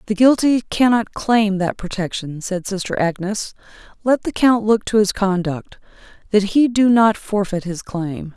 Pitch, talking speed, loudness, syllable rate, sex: 205 Hz, 165 wpm, -18 LUFS, 4.3 syllables/s, female